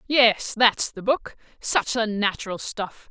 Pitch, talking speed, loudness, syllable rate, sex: 220 Hz, 135 wpm, -23 LUFS, 3.8 syllables/s, female